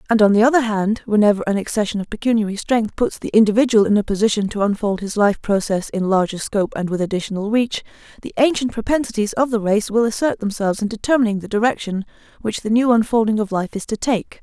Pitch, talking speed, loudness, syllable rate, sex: 215 Hz, 210 wpm, -19 LUFS, 6.4 syllables/s, female